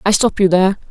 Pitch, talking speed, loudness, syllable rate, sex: 195 Hz, 265 wpm, -14 LUFS, 6.9 syllables/s, female